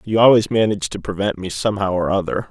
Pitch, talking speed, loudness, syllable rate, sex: 100 Hz, 215 wpm, -18 LUFS, 6.6 syllables/s, male